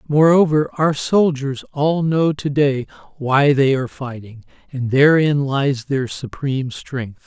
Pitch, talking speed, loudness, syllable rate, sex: 140 Hz, 140 wpm, -18 LUFS, 3.9 syllables/s, male